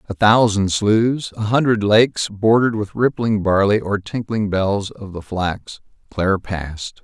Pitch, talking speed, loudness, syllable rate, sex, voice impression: 105 Hz, 155 wpm, -18 LUFS, 4.3 syllables/s, male, masculine, adult-like, slightly thick, cool, slightly intellectual, slightly unique